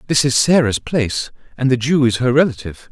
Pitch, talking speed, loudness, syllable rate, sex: 130 Hz, 205 wpm, -16 LUFS, 6.1 syllables/s, male